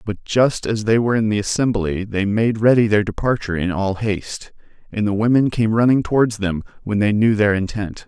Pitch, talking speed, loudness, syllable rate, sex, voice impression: 105 Hz, 210 wpm, -18 LUFS, 5.5 syllables/s, male, masculine, adult-like, slightly soft, slightly sincere, calm, friendly, slightly sweet